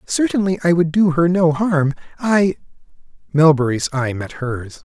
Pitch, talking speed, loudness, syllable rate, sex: 165 Hz, 135 wpm, -17 LUFS, 4.4 syllables/s, male